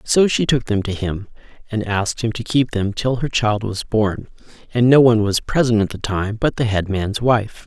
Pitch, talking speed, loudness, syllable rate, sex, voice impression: 110 Hz, 225 wpm, -18 LUFS, 4.9 syllables/s, male, masculine, adult-like, slightly relaxed, slightly weak, slightly muffled, fluent, slightly intellectual, slightly refreshing, friendly, unique, slightly modest